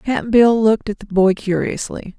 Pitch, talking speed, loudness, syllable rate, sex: 210 Hz, 190 wpm, -16 LUFS, 4.7 syllables/s, female